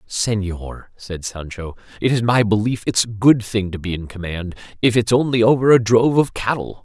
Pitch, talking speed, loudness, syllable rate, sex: 110 Hz, 200 wpm, -18 LUFS, 5.1 syllables/s, male